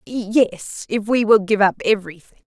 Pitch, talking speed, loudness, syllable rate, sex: 210 Hz, 170 wpm, -18 LUFS, 4.6 syllables/s, female